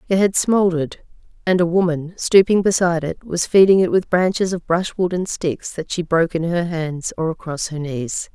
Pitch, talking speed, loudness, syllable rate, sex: 175 Hz, 200 wpm, -19 LUFS, 5.1 syllables/s, female